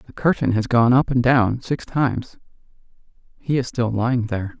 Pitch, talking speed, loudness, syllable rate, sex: 120 Hz, 185 wpm, -20 LUFS, 5.1 syllables/s, male